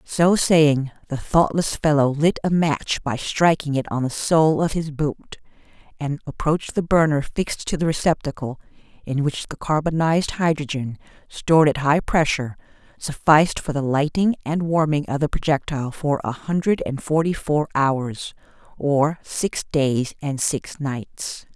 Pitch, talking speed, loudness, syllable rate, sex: 150 Hz, 155 wpm, -21 LUFS, 4.6 syllables/s, female